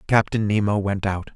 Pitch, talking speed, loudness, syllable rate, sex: 100 Hz, 175 wpm, -22 LUFS, 5.0 syllables/s, male